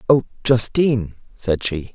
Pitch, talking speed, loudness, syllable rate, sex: 110 Hz, 125 wpm, -19 LUFS, 4.4 syllables/s, male